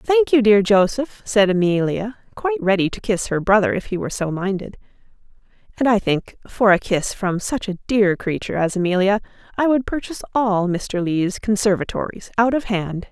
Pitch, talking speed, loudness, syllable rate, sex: 205 Hz, 185 wpm, -19 LUFS, 2.4 syllables/s, female